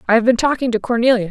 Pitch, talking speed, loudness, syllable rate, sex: 235 Hz, 275 wpm, -16 LUFS, 7.8 syllables/s, female